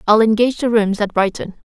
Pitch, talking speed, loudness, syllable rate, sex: 220 Hz, 215 wpm, -16 LUFS, 6.3 syllables/s, female